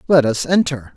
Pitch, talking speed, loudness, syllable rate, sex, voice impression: 140 Hz, 190 wpm, -17 LUFS, 5.1 syllables/s, male, masculine, middle-aged, tensed, slightly powerful, slightly soft, slightly muffled, raspy, calm, slightly mature, wild, lively, slightly modest